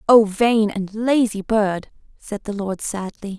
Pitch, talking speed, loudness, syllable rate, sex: 210 Hz, 160 wpm, -20 LUFS, 3.7 syllables/s, female